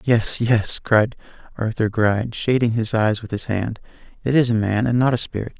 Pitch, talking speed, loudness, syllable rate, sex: 110 Hz, 205 wpm, -20 LUFS, 5.0 syllables/s, male